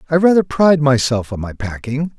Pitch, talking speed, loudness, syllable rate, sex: 140 Hz, 190 wpm, -16 LUFS, 5.5 syllables/s, male